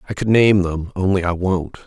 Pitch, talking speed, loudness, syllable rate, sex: 95 Hz, 225 wpm, -18 LUFS, 5.1 syllables/s, male